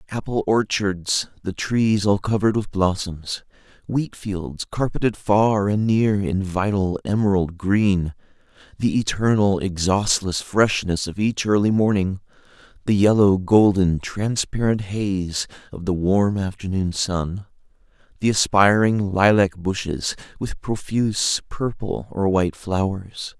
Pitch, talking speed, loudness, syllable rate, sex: 100 Hz, 120 wpm, -21 LUFS, 3.9 syllables/s, male